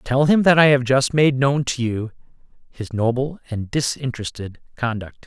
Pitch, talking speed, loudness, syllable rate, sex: 130 Hz, 170 wpm, -19 LUFS, 4.8 syllables/s, male